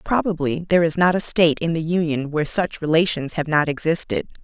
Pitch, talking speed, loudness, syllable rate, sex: 165 Hz, 205 wpm, -20 LUFS, 6.0 syllables/s, female